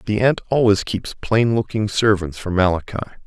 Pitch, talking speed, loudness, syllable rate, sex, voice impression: 105 Hz, 145 wpm, -19 LUFS, 5.2 syllables/s, male, masculine, middle-aged, thick, tensed, powerful, soft, clear, slightly nasal, cool, intellectual, calm, mature, friendly, reassuring, wild, slightly lively, kind